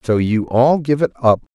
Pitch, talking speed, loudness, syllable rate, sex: 125 Hz, 235 wpm, -16 LUFS, 4.8 syllables/s, male